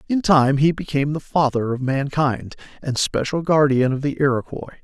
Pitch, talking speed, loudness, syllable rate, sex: 145 Hz, 175 wpm, -20 LUFS, 5.2 syllables/s, male